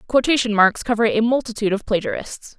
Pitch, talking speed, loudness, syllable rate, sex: 225 Hz, 165 wpm, -19 LUFS, 6.2 syllables/s, female